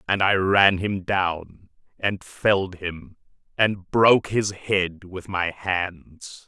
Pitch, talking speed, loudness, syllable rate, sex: 95 Hz, 140 wpm, -22 LUFS, 3.0 syllables/s, male